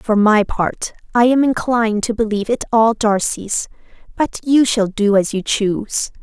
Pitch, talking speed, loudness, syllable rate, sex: 220 Hz, 175 wpm, -16 LUFS, 4.5 syllables/s, female